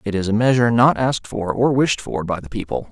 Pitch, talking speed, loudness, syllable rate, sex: 110 Hz, 270 wpm, -19 LUFS, 6.1 syllables/s, male